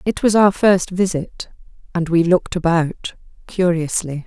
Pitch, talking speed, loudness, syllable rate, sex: 175 Hz, 140 wpm, -17 LUFS, 4.3 syllables/s, female